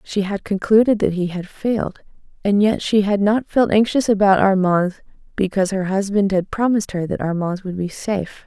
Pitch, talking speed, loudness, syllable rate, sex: 200 Hz, 190 wpm, -19 LUFS, 5.3 syllables/s, female